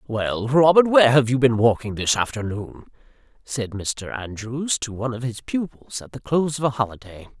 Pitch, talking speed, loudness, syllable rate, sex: 120 Hz, 185 wpm, -21 LUFS, 5.1 syllables/s, male